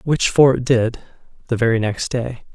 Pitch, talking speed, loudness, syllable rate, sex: 120 Hz, 165 wpm, -18 LUFS, 4.3 syllables/s, male